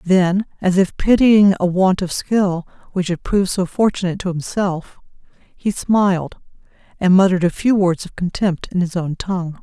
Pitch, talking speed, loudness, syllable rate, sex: 185 Hz, 175 wpm, -17 LUFS, 4.9 syllables/s, female